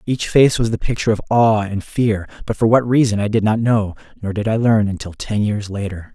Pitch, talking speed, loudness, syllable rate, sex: 110 Hz, 245 wpm, -18 LUFS, 5.5 syllables/s, male